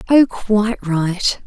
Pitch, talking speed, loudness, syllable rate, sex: 210 Hz, 125 wpm, -17 LUFS, 3.3 syllables/s, female